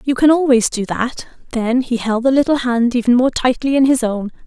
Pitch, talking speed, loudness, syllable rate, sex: 250 Hz, 230 wpm, -16 LUFS, 5.3 syllables/s, female